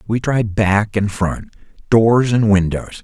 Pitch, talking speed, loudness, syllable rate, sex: 105 Hz, 160 wpm, -16 LUFS, 3.9 syllables/s, male